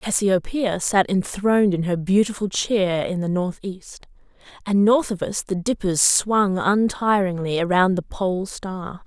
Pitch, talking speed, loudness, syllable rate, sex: 190 Hz, 145 wpm, -21 LUFS, 4.0 syllables/s, female